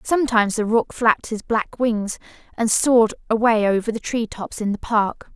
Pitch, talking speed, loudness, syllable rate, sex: 225 Hz, 190 wpm, -20 LUFS, 5.1 syllables/s, female